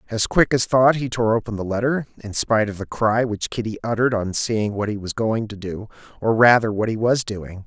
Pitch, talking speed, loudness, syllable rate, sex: 110 Hz, 245 wpm, -21 LUFS, 5.4 syllables/s, male